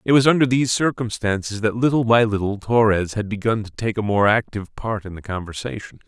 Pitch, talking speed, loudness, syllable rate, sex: 110 Hz, 205 wpm, -20 LUFS, 5.9 syllables/s, male